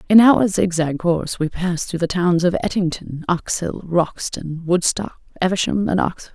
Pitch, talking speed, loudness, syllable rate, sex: 175 Hz, 160 wpm, -19 LUFS, 4.8 syllables/s, female